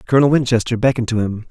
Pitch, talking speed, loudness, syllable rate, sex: 120 Hz, 200 wpm, -17 LUFS, 8.2 syllables/s, male